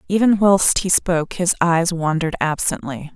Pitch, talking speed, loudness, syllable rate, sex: 175 Hz, 150 wpm, -18 LUFS, 4.8 syllables/s, female